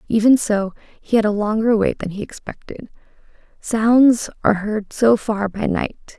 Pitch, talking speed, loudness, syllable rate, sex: 220 Hz, 165 wpm, -18 LUFS, 4.4 syllables/s, female